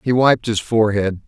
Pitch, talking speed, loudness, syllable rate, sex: 110 Hz, 190 wpm, -17 LUFS, 5.2 syllables/s, male